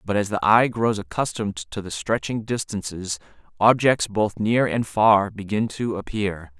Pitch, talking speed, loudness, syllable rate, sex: 105 Hz, 165 wpm, -22 LUFS, 4.5 syllables/s, male